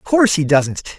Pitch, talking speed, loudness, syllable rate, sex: 180 Hz, 245 wpm, -16 LUFS, 6.2 syllables/s, male